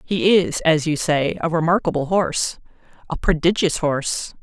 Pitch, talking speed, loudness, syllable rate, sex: 165 Hz, 135 wpm, -19 LUFS, 4.9 syllables/s, female